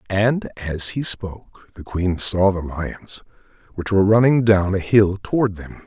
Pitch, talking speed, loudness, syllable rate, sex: 100 Hz, 175 wpm, -19 LUFS, 4.4 syllables/s, male